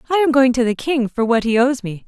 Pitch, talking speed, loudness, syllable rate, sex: 250 Hz, 320 wpm, -17 LUFS, 6.0 syllables/s, female